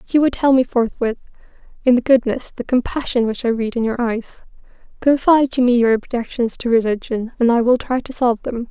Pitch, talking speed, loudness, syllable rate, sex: 240 Hz, 205 wpm, -18 LUFS, 5.9 syllables/s, female